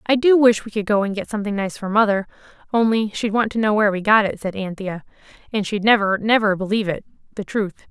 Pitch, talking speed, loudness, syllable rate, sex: 210 Hz, 235 wpm, -19 LUFS, 6.4 syllables/s, female